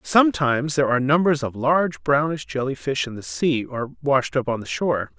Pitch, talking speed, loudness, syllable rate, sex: 140 Hz, 210 wpm, -22 LUFS, 5.7 syllables/s, male